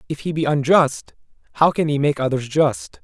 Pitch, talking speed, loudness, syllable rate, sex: 150 Hz, 195 wpm, -19 LUFS, 5.0 syllables/s, male